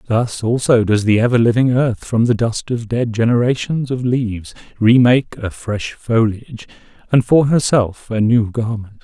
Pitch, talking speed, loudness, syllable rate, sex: 115 Hz, 175 wpm, -16 LUFS, 4.6 syllables/s, male